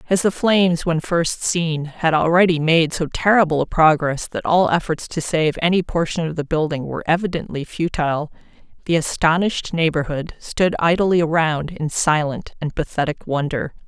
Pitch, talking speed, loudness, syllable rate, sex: 160 Hz, 160 wpm, -19 LUFS, 5.0 syllables/s, female